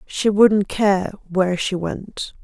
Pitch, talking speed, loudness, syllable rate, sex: 195 Hz, 150 wpm, -19 LUFS, 3.5 syllables/s, female